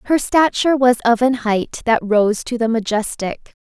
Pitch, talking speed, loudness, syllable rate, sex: 235 Hz, 180 wpm, -17 LUFS, 4.6 syllables/s, female